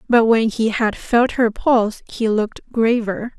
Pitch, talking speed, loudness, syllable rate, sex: 225 Hz, 175 wpm, -18 LUFS, 4.4 syllables/s, female